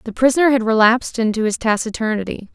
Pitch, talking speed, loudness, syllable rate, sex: 230 Hz, 165 wpm, -17 LUFS, 6.6 syllables/s, female